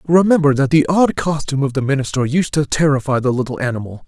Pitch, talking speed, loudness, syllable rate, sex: 145 Hz, 205 wpm, -16 LUFS, 6.4 syllables/s, male